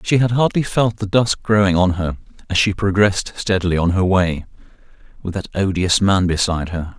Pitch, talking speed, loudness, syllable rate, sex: 95 Hz, 190 wpm, -18 LUFS, 5.4 syllables/s, male